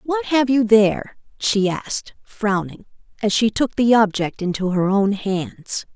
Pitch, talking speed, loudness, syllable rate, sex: 210 Hz, 160 wpm, -19 LUFS, 4.1 syllables/s, female